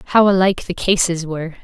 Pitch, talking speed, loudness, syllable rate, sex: 180 Hz, 185 wpm, -17 LUFS, 5.8 syllables/s, female